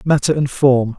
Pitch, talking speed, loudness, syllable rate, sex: 135 Hz, 185 wpm, -15 LUFS, 4.5 syllables/s, male